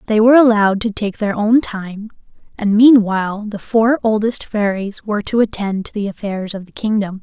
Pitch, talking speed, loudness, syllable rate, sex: 210 Hz, 190 wpm, -16 LUFS, 5.2 syllables/s, female